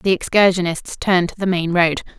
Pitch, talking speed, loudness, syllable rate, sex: 180 Hz, 190 wpm, -17 LUFS, 5.5 syllables/s, female